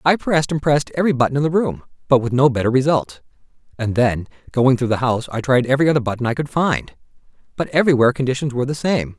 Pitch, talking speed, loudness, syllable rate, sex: 130 Hz, 220 wpm, -18 LUFS, 7.2 syllables/s, male